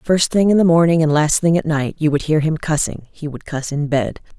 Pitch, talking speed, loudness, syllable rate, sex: 155 Hz, 260 wpm, -17 LUFS, 5.4 syllables/s, female